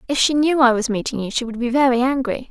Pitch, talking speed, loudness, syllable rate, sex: 250 Hz, 290 wpm, -18 LUFS, 6.4 syllables/s, female